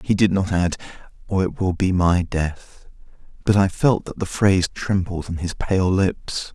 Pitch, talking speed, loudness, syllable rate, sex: 95 Hz, 195 wpm, -21 LUFS, 4.4 syllables/s, male